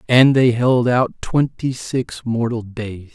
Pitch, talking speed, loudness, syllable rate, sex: 120 Hz, 155 wpm, -18 LUFS, 3.4 syllables/s, male